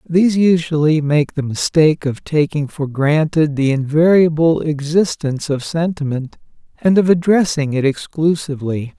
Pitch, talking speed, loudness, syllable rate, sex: 155 Hz, 125 wpm, -16 LUFS, 4.7 syllables/s, male